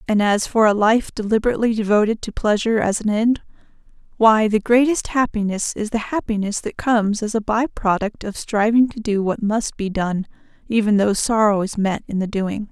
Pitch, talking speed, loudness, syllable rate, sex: 215 Hz, 185 wpm, -19 LUFS, 5.3 syllables/s, female